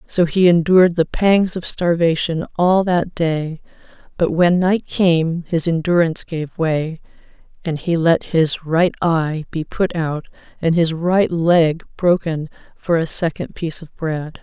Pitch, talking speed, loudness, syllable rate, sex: 170 Hz, 160 wpm, -18 LUFS, 4.0 syllables/s, female